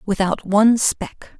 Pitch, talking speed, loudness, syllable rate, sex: 205 Hz, 130 wpm, -17 LUFS, 4.0 syllables/s, female